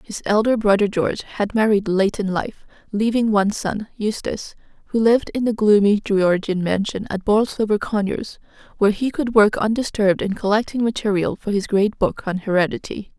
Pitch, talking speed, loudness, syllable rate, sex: 210 Hz, 170 wpm, -20 LUFS, 5.3 syllables/s, female